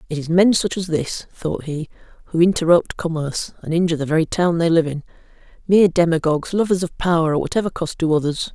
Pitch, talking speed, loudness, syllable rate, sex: 165 Hz, 205 wpm, -19 LUFS, 6.3 syllables/s, female